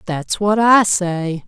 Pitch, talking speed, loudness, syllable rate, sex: 190 Hz, 165 wpm, -16 LUFS, 3.1 syllables/s, female